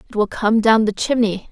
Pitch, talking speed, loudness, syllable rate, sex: 215 Hz, 240 wpm, -17 LUFS, 5.3 syllables/s, female